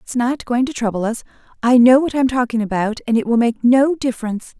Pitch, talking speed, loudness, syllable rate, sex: 240 Hz, 235 wpm, -17 LUFS, 5.9 syllables/s, female